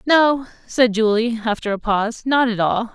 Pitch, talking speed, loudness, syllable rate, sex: 230 Hz, 185 wpm, -19 LUFS, 4.8 syllables/s, female